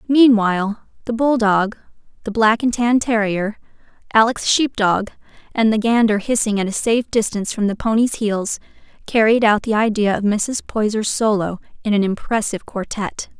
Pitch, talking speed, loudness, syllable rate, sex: 220 Hz, 160 wpm, -18 LUFS, 5.0 syllables/s, female